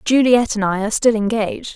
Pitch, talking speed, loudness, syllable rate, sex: 220 Hz, 205 wpm, -17 LUFS, 6.1 syllables/s, female